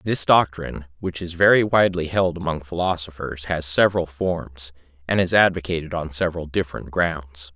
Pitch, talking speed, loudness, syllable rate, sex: 85 Hz, 150 wpm, -21 LUFS, 5.3 syllables/s, male